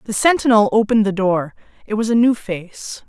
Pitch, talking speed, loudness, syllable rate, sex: 215 Hz, 195 wpm, -17 LUFS, 5.4 syllables/s, female